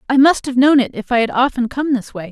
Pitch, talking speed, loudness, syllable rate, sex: 255 Hz, 310 wpm, -16 LUFS, 6.2 syllables/s, female